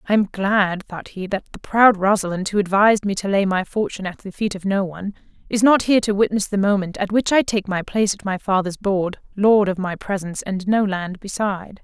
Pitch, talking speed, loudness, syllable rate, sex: 195 Hz, 240 wpm, -20 LUFS, 5.7 syllables/s, female